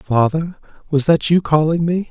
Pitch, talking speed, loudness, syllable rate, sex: 155 Hz, 170 wpm, -16 LUFS, 4.6 syllables/s, male